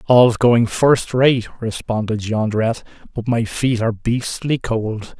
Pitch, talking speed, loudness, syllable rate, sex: 115 Hz, 140 wpm, -18 LUFS, 3.8 syllables/s, male